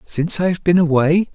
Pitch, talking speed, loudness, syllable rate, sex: 165 Hz, 180 wpm, -16 LUFS, 5.7 syllables/s, male